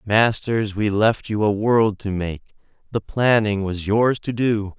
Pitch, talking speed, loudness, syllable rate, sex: 105 Hz, 175 wpm, -20 LUFS, 3.9 syllables/s, male